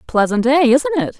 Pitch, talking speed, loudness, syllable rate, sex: 265 Hz, 200 wpm, -15 LUFS, 4.8 syllables/s, female